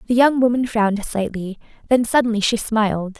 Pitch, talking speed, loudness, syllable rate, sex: 220 Hz, 170 wpm, -19 LUFS, 5.6 syllables/s, female